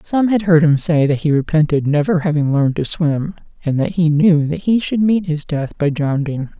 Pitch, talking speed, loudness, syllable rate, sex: 185 Hz, 230 wpm, -16 LUFS, 5.1 syllables/s, female